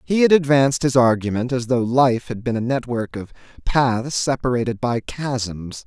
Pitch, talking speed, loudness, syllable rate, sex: 125 Hz, 175 wpm, -20 LUFS, 4.6 syllables/s, male